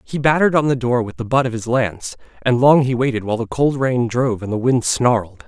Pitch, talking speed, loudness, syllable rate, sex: 125 Hz, 265 wpm, -18 LUFS, 6.1 syllables/s, male